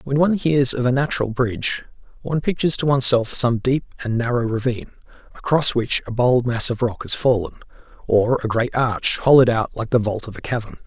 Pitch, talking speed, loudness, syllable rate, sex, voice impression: 125 Hz, 210 wpm, -19 LUFS, 5.9 syllables/s, male, very masculine, very adult-like, middle-aged, very thick, very tensed, very powerful, very bright, hard, very clear, very fluent, very raspy, cool, intellectual, very refreshing, sincere, calm, mature, friendly, reassuring, very unique, very wild, slightly sweet, very lively, kind, intense